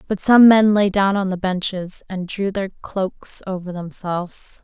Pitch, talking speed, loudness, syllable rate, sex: 190 Hz, 180 wpm, -19 LUFS, 4.1 syllables/s, female